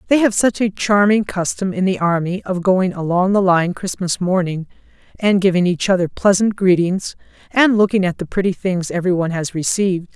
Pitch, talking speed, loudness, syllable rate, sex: 185 Hz, 185 wpm, -17 LUFS, 5.3 syllables/s, female